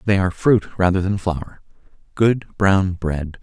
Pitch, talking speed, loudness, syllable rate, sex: 95 Hz, 140 wpm, -19 LUFS, 4.4 syllables/s, male